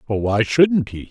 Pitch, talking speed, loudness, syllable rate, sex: 120 Hz, 165 wpm, -18 LUFS, 3.2 syllables/s, male